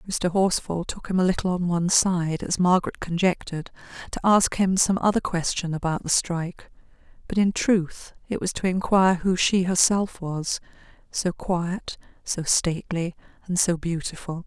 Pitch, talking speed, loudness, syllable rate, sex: 180 Hz, 160 wpm, -24 LUFS, 4.8 syllables/s, female